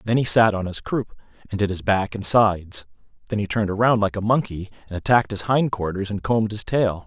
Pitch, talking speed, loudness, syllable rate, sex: 105 Hz, 240 wpm, -21 LUFS, 6.0 syllables/s, male